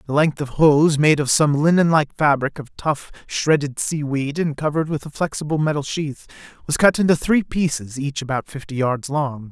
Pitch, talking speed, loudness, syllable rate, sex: 150 Hz, 190 wpm, -20 LUFS, 5.0 syllables/s, male